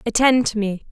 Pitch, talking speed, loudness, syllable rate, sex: 225 Hz, 195 wpm, -18 LUFS, 5.3 syllables/s, female